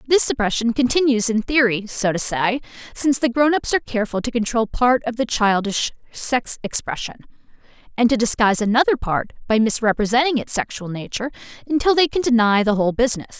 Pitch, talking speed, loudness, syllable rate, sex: 235 Hz, 175 wpm, -19 LUFS, 6.0 syllables/s, female